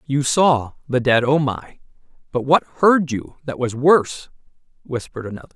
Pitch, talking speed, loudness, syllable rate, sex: 135 Hz, 160 wpm, -19 LUFS, 5.1 syllables/s, male